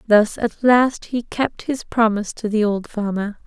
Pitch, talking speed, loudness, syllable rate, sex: 220 Hz, 190 wpm, -20 LUFS, 4.3 syllables/s, female